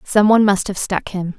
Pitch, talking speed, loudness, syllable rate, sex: 200 Hz, 260 wpm, -16 LUFS, 5.4 syllables/s, female